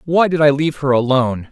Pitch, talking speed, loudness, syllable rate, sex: 140 Hz, 240 wpm, -15 LUFS, 6.5 syllables/s, male